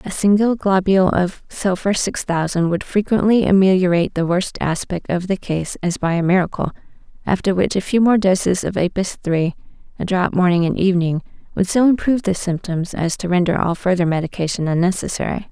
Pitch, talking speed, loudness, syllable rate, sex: 185 Hz, 180 wpm, -18 LUFS, 5.6 syllables/s, female